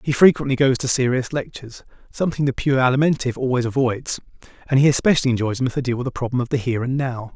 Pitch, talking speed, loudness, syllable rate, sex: 130 Hz, 210 wpm, -20 LUFS, 7.2 syllables/s, male